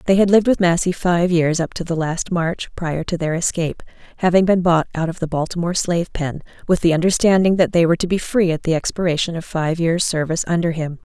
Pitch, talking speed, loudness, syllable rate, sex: 170 Hz, 230 wpm, -18 LUFS, 6.1 syllables/s, female